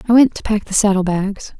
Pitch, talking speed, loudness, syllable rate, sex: 205 Hz, 265 wpm, -16 LUFS, 5.8 syllables/s, female